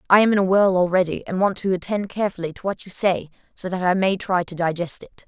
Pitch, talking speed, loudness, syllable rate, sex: 185 Hz, 260 wpm, -21 LUFS, 6.3 syllables/s, female